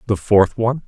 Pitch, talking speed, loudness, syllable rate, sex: 110 Hz, 205 wpm, -16 LUFS, 5.9 syllables/s, male